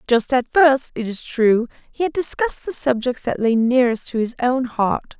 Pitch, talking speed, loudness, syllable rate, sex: 255 Hz, 210 wpm, -19 LUFS, 4.9 syllables/s, female